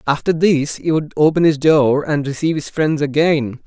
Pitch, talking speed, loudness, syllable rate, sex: 150 Hz, 195 wpm, -16 LUFS, 4.9 syllables/s, male